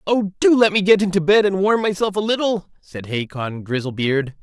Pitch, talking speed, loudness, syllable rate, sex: 185 Hz, 205 wpm, -18 LUFS, 5.1 syllables/s, male